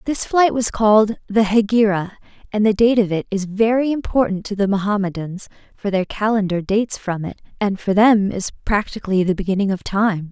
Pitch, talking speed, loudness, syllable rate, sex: 205 Hz, 185 wpm, -18 LUFS, 5.4 syllables/s, female